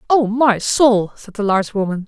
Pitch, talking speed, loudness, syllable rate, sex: 220 Hz, 205 wpm, -16 LUFS, 4.9 syllables/s, female